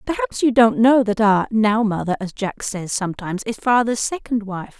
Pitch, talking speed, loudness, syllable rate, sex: 220 Hz, 200 wpm, -19 LUFS, 5.1 syllables/s, female